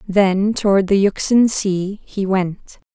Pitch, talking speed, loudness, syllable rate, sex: 195 Hz, 145 wpm, -17 LUFS, 3.8 syllables/s, female